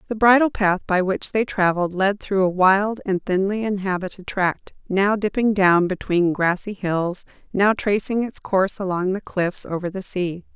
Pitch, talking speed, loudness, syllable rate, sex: 195 Hz, 170 wpm, -21 LUFS, 4.6 syllables/s, female